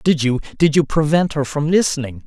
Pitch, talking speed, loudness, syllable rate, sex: 150 Hz, 185 wpm, -17 LUFS, 5.6 syllables/s, male